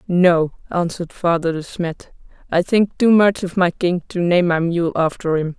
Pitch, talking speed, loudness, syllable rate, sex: 175 Hz, 195 wpm, -18 LUFS, 4.6 syllables/s, female